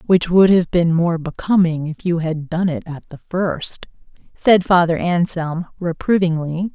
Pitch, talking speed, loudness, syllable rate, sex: 170 Hz, 160 wpm, -18 LUFS, 4.2 syllables/s, female